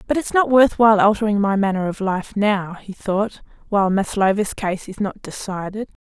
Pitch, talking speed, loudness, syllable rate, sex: 205 Hz, 190 wpm, -19 LUFS, 5.2 syllables/s, female